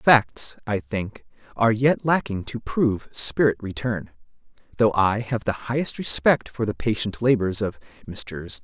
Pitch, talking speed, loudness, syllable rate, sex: 110 Hz, 155 wpm, -23 LUFS, 4.3 syllables/s, male